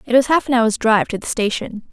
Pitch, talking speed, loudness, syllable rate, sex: 235 Hz, 280 wpm, -17 LUFS, 6.2 syllables/s, female